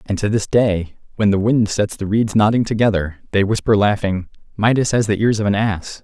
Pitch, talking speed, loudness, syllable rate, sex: 105 Hz, 220 wpm, -17 LUFS, 5.2 syllables/s, male